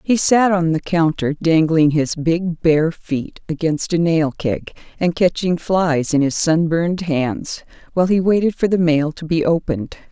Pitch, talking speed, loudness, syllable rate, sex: 165 Hz, 180 wpm, -18 LUFS, 4.3 syllables/s, female